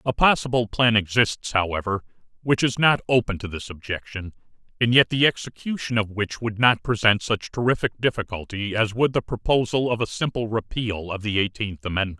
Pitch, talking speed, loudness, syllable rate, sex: 110 Hz, 175 wpm, -23 LUFS, 5.4 syllables/s, male